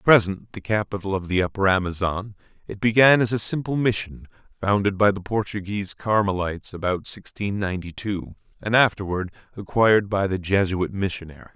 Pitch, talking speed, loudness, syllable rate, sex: 100 Hz, 155 wpm, -22 LUFS, 5.6 syllables/s, male